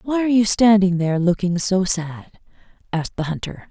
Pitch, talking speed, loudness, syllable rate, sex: 195 Hz, 180 wpm, -19 LUFS, 5.6 syllables/s, female